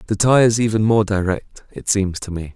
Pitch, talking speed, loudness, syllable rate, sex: 105 Hz, 235 wpm, -18 LUFS, 5.2 syllables/s, male